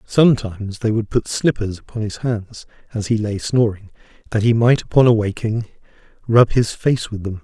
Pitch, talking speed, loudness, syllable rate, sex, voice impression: 110 Hz, 180 wpm, -18 LUFS, 5.2 syllables/s, male, masculine, adult-like, slightly dark, slightly muffled, cool, slightly refreshing, sincere